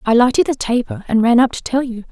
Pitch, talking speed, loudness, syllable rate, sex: 245 Hz, 285 wpm, -16 LUFS, 6.2 syllables/s, female